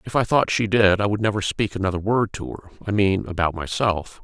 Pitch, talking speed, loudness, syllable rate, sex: 100 Hz, 225 wpm, -21 LUFS, 5.7 syllables/s, male